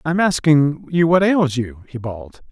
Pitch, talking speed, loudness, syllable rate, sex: 145 Hz, 190 wpm, -17 LUFS, 4.4 syllables/s, male